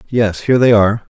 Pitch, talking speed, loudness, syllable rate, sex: 110 Hz, 210 wpm, -13 LUFS, 6.5 syllables/s, male